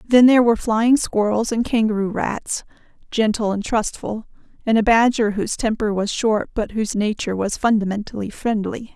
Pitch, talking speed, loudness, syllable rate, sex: 220 Hz, 160 wpm, -20 LUFS, 5.3 syllables/s, female